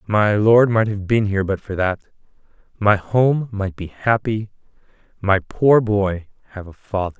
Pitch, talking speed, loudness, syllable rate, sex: 105 Hz, 165 wpm, -19 LUFS, 4.3 syllables/s, male